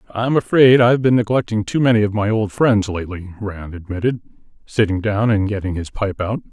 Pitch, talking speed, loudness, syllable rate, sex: 105 Hz, 195 wpm, -18 LUFS, 5.7 syllables/s, male